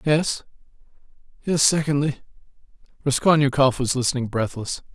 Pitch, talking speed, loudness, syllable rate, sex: 140 Hz, 85 wpm, -21 LUFS, 5.2 syllables/s, male